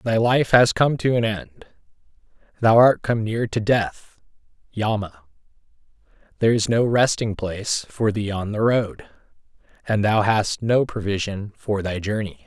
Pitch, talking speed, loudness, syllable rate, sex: 110 Hz, 155 wpm, -21 LUFS, 4.4 syllables/s, male